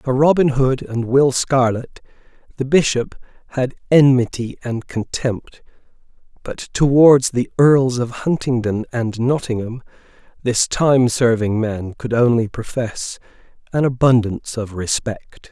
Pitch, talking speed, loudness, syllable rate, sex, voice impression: 125 Hz, 120 wpm, -18 LUFS, 4.0 syllables/s, male, masculine, middle-aged, relaxed, slightly weak, slightly halting, raspy, calm, slightly mature, friendly, reassuring, slightly wild, kind, modest